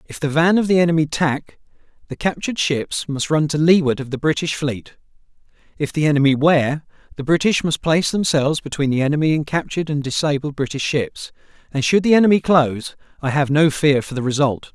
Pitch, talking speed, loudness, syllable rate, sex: 150 Hz, 195 wpm, -18 LUFS, 5.8 syllables/s, male